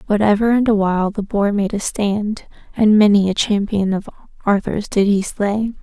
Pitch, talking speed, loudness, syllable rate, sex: 205 Hz, 185 wpm, -17 LUFS, 4.8 syllables/s, female